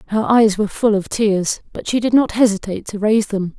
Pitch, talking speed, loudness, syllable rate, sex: 210 Hz, 235 wpm, -17 LUFS, 5.9 syllables/s, female